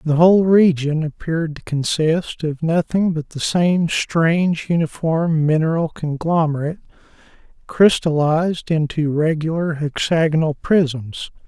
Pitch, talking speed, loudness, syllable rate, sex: 160 Hz, 105 wpm, -18 LUFS, 4.3 syllables/s, male